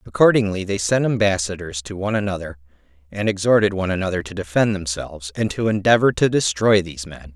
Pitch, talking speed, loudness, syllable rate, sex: 95 Hz, 170 wpm, -20 LUFS, 6.3 syllables/s, male